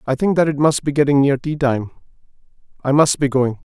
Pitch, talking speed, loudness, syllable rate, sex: 140 Hz, 225 wpm, -17 LUFS, 5.7 syllables/s, male